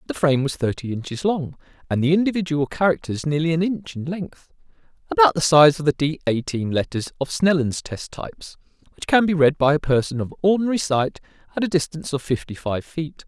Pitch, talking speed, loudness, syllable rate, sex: 155 Hz, 195 wpm, -21 LUFS, 5.8 syllables/s, male